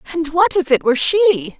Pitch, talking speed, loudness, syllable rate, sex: 315 Hz, 225 wpm, -15 LUFS, 5.3 syllables/s, female